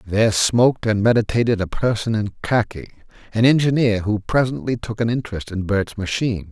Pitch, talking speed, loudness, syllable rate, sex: 110 Hz, 165 wpm, -19 LUFS, 5.7 syllables/s, male